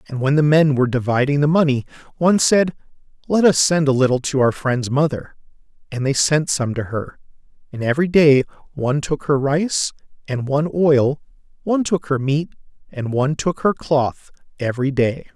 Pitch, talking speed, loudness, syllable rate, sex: 145 Hz, 180 wpm, -18 LUFS, 5.4 syllables/s, male